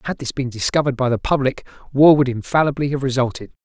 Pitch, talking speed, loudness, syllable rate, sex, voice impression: 130 Hz, 200 wpm, -18 LUFS, 6.8 syllables/s, male, masculine, adult-like, tensed, bright, clear, raspy, slightly sincere, friendly, unique, slightly wild, slightly kind